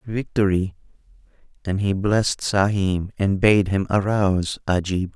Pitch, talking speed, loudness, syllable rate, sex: 100 Hz, 115 wpm, -21 LUFS, 4.3 syllables/s, male